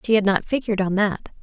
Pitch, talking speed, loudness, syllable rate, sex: 205 Hz, 255 wpm, -21 LUFS, 6.8 syllables/s, female